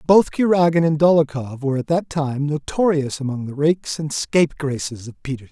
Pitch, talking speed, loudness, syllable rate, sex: 150 Hz, 175 wpm, -20 LUFS, 5.7 syllables/s, male